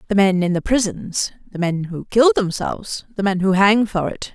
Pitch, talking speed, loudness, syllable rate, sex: 195 Hz, 220 wpm, -19 LUFS, 4.9 syllables/s, female